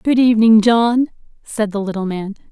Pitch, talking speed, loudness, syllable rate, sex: 220 Hz, 165 wpm, -15 LUFS, 5.2 syllables/s, female